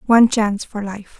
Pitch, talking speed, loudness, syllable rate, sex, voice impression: 215 Hz, 200 wpm, -17 LUFS, 5.8 syllables/s, female, feminine, adult-like, relaxed, muffled, calm, friendly, reassuring, kind, modest